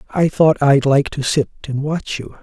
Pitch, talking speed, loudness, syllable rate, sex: 145 Hz, 225 wpm, -17 LUFS, 4.4 syllables/s, male